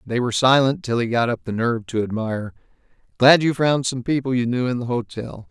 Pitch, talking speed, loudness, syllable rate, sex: 125 Hz, 230 wpm, -20 LUFS, 6.0 syllables/s, male